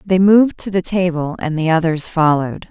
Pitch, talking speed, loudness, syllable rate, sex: 175 Hz, 200 wpm, -16 LUFS, 5.4 syllables/s, female